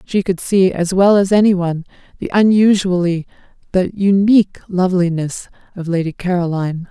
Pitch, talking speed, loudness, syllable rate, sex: 185 Hz, 140 wpm, -15 LUFS, 5.3 syllables/s, female